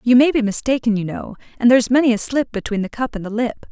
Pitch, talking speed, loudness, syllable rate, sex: 235 Hz, 275 wpm, -18 LUFS, 6.6 syllables/s, female